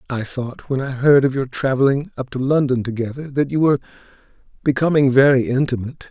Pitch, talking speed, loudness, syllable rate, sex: 135 Hz, 175 wpm, -18 LUFS, 6.1 syllables/s, male